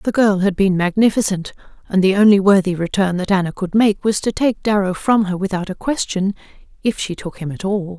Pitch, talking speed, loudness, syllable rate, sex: 195 Hz, 220 wpm, -17 LUFS, 5.5 syllables/s, female